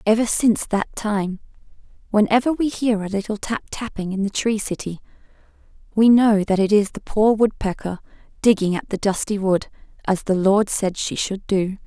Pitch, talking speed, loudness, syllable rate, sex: 205 Hz, 175 wpm, -20 LUFS, 5.0 syllables/s, female